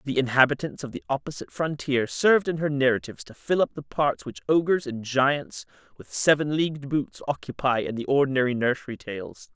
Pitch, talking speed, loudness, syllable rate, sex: 135 Hz, 180 wpm, -25 LUFS, 5.7 syllables/s, male